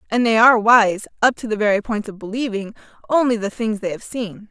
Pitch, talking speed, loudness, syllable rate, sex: 220 Hz, 225 wpm, -18 LUFS, 5.9 syllables/s, female